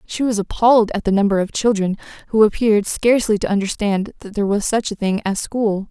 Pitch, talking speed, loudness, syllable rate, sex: 210 Hz, 215 wpm, -18 LUFS, 6.0 syllables/s, female